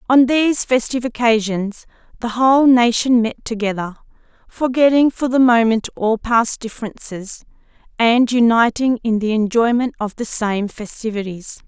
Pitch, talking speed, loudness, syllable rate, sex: 230 Hz, 130 wpm, -17 LUFS, 4.7 syllables/s, female